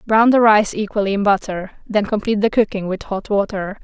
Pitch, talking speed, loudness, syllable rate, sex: 205 Hz, 205 wpm, -18 LUFS, 5.6 syllables/s, female